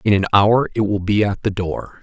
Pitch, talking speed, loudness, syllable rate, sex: 100 Hz, 265 wpm, -18 LUFS, 5.0 syllables/s, male